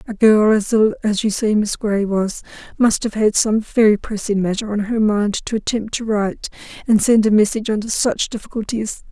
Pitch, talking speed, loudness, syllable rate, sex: 215 Hz, 205 wpm, -18 LUFS, 5.2 syllables/s, female